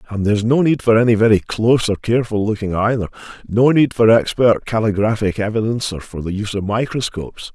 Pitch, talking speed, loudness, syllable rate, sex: 110 Hz, 175 wpm, -17 LUFS, 6.3 syllables/s, male